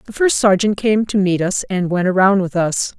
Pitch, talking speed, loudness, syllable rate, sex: 195 Hz, 240 wpm, -16 LUFS, 5.0 syllables/s, female